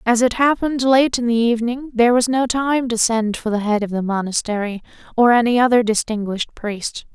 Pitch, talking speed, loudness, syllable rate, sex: 235 Hz, 200 wpm, -18 LUFS, 5.6 syllables/s, female